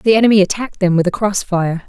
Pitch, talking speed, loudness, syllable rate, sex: 195 Hz, 255 wpm, -15 LUFS, 6.6 syllables/s, female